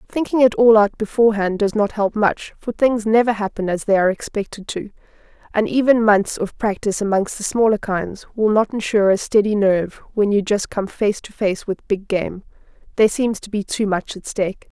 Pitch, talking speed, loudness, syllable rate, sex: 210 Hz, 205 wpm, -19 LUFS, 5.4 syllables/s, female